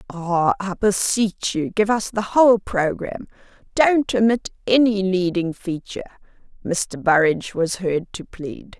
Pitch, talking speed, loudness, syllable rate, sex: 195 Hz, 130 wpm, -20 LUFS, 4.3 syllables/s, female